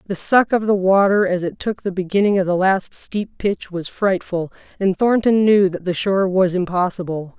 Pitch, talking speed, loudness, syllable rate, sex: 190 Hz, 205 wpm, -18 LUFS, 4.9 syllables/s, female